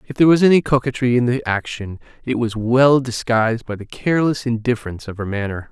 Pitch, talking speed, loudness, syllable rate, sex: 120 Hz, 200 wpm, -18 LUFS, 6.2 syllables/s, male